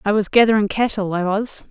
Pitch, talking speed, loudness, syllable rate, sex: 205 Hz, 210 wpm, -18 LUFS, 5.7 syllables/s, female